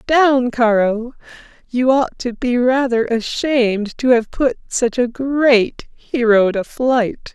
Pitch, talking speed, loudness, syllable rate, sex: 245 Hz, 140 wpm, -16 LUFS, 3.5 syllables/s, female